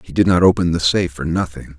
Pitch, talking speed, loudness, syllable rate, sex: 85 Hz, 270 wpm, -17 LUFS, 6.5 syllables/s, male